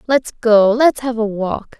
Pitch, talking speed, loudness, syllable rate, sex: 230 Hz, 200 wpm, -15 LUFS, 3.7 syllables/s, female